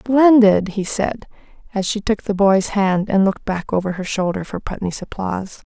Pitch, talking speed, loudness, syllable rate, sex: 200 Hz, 190 wpm, -18 LUFS, 4.8 syllables/s, female